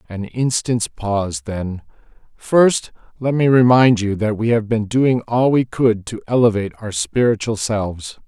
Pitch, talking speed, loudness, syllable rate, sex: 110 Hz, 160 wpm, -18 LUFS, 4.4 syllables/s, male